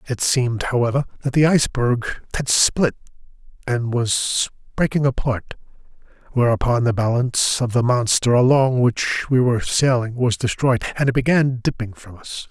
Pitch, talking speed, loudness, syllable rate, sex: 125 Hz, 150 wpm, -19 LUFS, 4.9 syllables/s, male